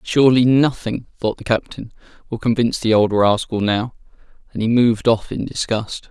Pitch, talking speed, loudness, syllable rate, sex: 115 Hz, 165 wpm, -18 LUFS, 5.2 syllables/s, male